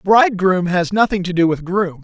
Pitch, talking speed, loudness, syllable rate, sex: 185 Hz, 205 wpm, -16 LUFS, 5.2 syllables/s, male